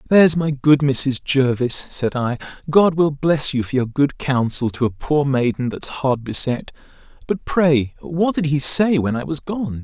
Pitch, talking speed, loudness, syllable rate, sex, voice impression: 140 Hz, 200 wpm, -19 LUFS, 4.4 syllables/s, male, masculine, adult-like, tensed, powerful, slightly halting, slightly raspy, mature, unique, wild, lively, strict, intense, slightly sharp